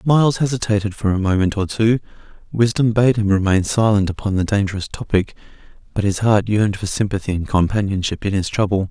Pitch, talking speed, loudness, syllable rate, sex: 105 Hz, 180 wpm, -18 LUFS, 6.0 syllables/s, male